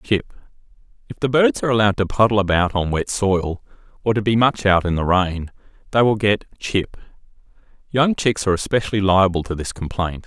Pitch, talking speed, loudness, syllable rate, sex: 100 Hz, 180 wpm, -19 LUFS, 5.7 syllables/s, male